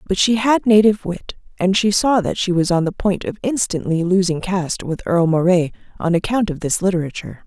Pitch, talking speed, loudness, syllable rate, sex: 185 Hz, 210 wpm, -18 LUFS, 5.8 syllables/s, female